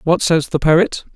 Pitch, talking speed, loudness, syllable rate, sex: 160 Hz, 210 wpm, -15 LUFS, 4.1 syllables/s, male